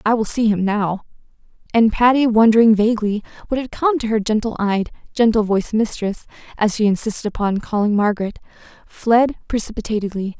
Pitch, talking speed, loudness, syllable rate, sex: 220 Hz, 145 wpm, -18 LUFS, 5.7 syllables/s, female